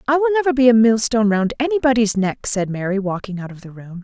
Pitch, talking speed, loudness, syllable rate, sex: 230 Hz, 240 wpm, -17 LUFS, 6.3 syllables/s, female